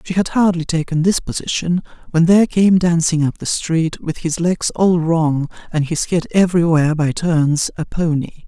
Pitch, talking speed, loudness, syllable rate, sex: 165 Hz, 185 wpm, -17 LUFS, 4.8 syllables/s, male